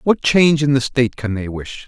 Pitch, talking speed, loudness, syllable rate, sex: 130 Hz, 255 wpm, -17 LUFS, 5.7 syllables/s, male